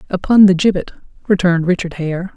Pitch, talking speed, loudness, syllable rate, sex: 180 Hz, 155 wpm, -14 LUFS, 6.3 syllables/s, female